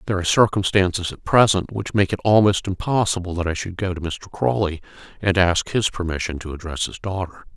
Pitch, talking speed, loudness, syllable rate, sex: 95 Hz, 200 wpm, -21 LUFS, 6.0 syllables/s, male